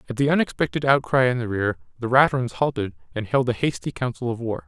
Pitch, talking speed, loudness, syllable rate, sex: 125 Hz, 220 wpm, -22 LUFS, 6.5 syllables/s, male